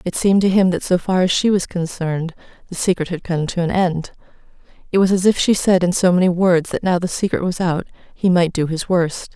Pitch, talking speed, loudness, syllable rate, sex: 180 Hz, 250 wpm, -18 LUFS, 5.8 syllables/s, female